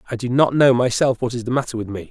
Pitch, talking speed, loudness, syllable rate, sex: 125 Hz, 315 wpm, -19 LUFS, 6.9 syllables/s, male